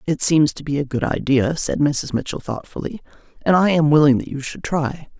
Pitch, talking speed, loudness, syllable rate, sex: 145 Hz, 220 wpm, -19 LUFS, 5.3 syllables/s, female